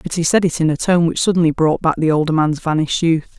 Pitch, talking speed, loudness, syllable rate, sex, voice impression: 165 Hz, 285 wpm, -16 LUFS, 6.5 syllables/s, female, feminine, middle-aged, tensed, clear, fluent, intellectual, calm, reassuring, elegant, slightly strict